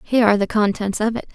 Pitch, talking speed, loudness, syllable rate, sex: 215 Hz, 265 wpm, -19 LUFS, 7.4 syllables/s, female